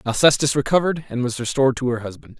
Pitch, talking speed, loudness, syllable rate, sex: 130 Hz, 200 wpm, -20 LUFS, 7.1 syllables/s, male